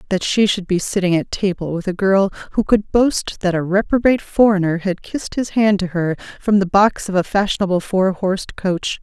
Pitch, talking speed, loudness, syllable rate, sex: 195 Hz, 215 wpm, -18 LUFS, 5.4 syllables/s, female